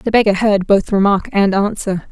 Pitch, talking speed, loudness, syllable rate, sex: 200 Hz, 200 wpm, -15 LUFS, 4.8 syllables/s, female